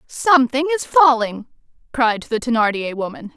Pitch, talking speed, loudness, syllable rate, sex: 250 Hz, 125 wpm, -17 LUFS, 4.7 syllables/s, female